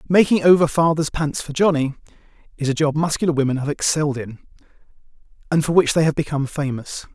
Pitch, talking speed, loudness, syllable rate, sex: 150 Hz, 175 wpm, -19 LUFS, 6.4 syllables/s, male